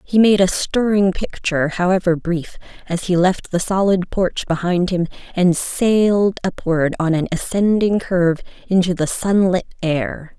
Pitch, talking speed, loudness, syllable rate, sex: 180 Hz, 150 wpm, -18 LUFS, 4.4 syllables/s, female